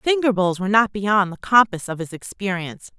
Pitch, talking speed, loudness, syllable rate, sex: 200 Hz, 200 wpm, -20 LUFS, 5.6 syllables/s, female